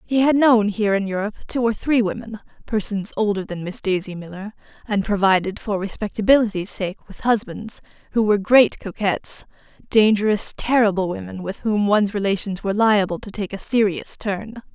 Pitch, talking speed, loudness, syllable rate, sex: 205 Hz, 155 wpm, -20 LUFS, 5.5 syllables/s, female